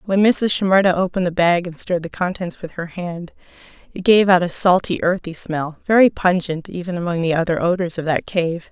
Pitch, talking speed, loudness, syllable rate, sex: 175 Hz, 205 wpm, -18 LUFS, 5.6 syllables/s, female